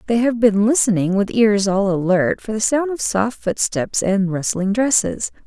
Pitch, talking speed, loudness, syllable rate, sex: 205 Hz, 185 wpm, -18 LUFS, 4.5 syllables/s, female